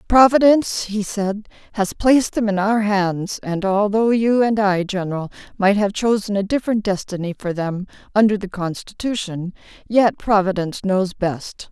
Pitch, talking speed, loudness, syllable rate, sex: 205 Hz, 155 wpm, -19 LUFS, 4.8 syllables/s, female